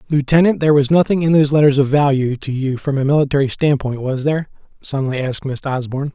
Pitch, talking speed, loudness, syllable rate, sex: 140 Hz, 205 wpm, -16 LUFS, 6.8 syllables/s, male